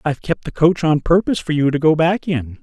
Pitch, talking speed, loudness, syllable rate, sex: 155 Hz, 275 wpm, -17 LUFS, 6.0 syllables/s, male